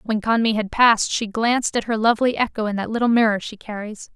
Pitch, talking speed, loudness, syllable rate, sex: 220 Hz, 230 wpm, -20 LUFS, 6.2 syllables/s, female